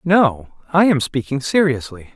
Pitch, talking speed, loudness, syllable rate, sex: 145 Hz, 140 wpm, -17 LUFS, 4.4 syllables/s, male